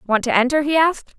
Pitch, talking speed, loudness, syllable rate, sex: 275 Hz, 255 wpm, -17 LUFS, 6.4 syllables/s, female